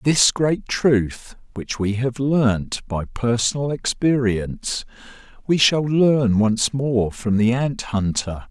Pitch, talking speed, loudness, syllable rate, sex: 120 Hz, 135 wpm, -20 LUFS, 3.3 syllables/s, male